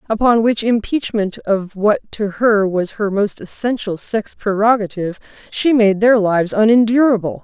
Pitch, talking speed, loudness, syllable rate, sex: 210 Hz, 145 wpm, -16 LUFS, 4.6 syllables/s, female